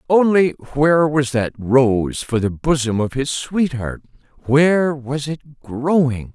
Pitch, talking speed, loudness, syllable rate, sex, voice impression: 140 Hz, 130 wpm, -18 LUFS, 3.8 syllables/s, male, masculine, middle-aged, thick, tensed, powerful, slightly hard, clear, slightly raspy, cool, intellectual, calm, mature, friendly, reassuring, wild, lively, slightly strict